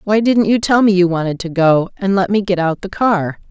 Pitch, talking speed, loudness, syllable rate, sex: 190 Hz, 275 wpm, -15 LUFS, 5.2 syllables/s, female